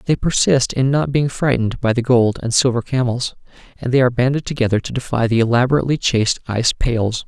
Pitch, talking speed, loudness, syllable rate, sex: 125 Hz, 200 wpm, -17 LUFS, 6.2 syllables/s, male